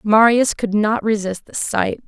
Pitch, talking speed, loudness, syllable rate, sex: 215 Hz, 175 wpm, -18 LUFS, 4.2 syllables/s, female